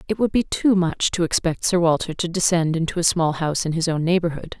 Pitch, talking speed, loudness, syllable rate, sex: 170 Hz, 250 wpm, -21 LUFS, 5.9 syllables/s, female